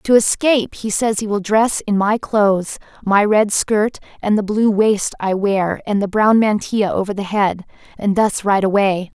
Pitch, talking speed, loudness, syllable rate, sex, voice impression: 205 Hz, 195 wpm, -17 LUFS, 4.5 syllables/s, female, very feminine, slightly young, slightly adult-like, thin, tensed, powerful, bright, slightly hard, clear, very fluent, cute, slightly cool, slightly intellectual, refreshing, sincere, calm, friendly, reassuring, unique, slightly elegant, wild, slightly sweet, slightly lively, slightly strict, slightly modest, slightly light